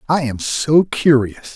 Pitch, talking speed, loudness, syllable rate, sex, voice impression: 130 Hz, 155 wpm, -16 LUFS, 3.7 syllables/s, male, masculine, middle-aged, slightly relaxed, powerful, bright, muffled, raspy, calm, mature, friendly, reassuring, wild, lively, kind